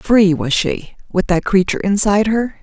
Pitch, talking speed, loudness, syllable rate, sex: 195 Hz, 185 wpm, -16 LUFS, 5.0 syllables/s, female